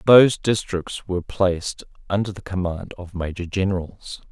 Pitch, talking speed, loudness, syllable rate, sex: 95 Hz, 140 wpm, -23 LUFS, 5.0 syllables/s, male